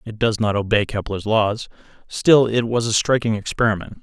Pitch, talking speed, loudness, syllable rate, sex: 110 Hz, 180 wpm, -19 LUFS, 5.1 syllables/s, male